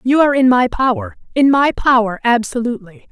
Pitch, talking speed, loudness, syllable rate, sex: 250 Hz, 155 wpm, -15 LUFS, 5.8 syllables/s, female